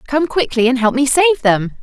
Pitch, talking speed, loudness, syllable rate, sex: 245 Hz, 230 wpm, -14 LUFS, 5.4 syllables/s, female